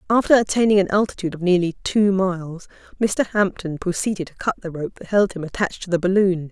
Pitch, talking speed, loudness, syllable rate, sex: 185 Hz, 205 wpm, -20 LUFS, 6.1 syllables/s, female